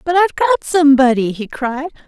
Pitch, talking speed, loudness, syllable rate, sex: 285 Hz, 175 wpm, -14 LUFS, 5.6 syllables/s, female